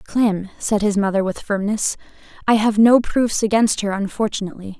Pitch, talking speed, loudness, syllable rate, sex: 210 Hz, 165 wpm, -19 LUFS, 5.2 syllables/s, female